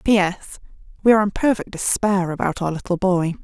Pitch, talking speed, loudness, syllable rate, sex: 190 Hz, 175 wpm, -20 LUFS, 5.8 syllables/s, female